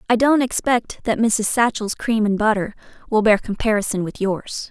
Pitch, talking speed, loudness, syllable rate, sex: 220 Hz, 180 wpm, -19 LUFS, 4.8 syllables/s, female